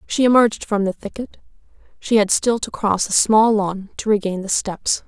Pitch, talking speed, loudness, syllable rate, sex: 210 Hz, 200 wpm, -18 LUFS, 4.9 syllables/s, female